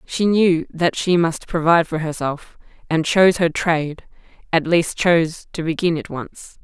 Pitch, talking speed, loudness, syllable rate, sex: 165 Hz, 170 wpm, -19 LUFS, 4.6 syllables/s, female